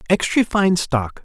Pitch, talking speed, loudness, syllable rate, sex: 170 Hz, 145 wpm, -18 LUFS, 3.9 syllables/s, male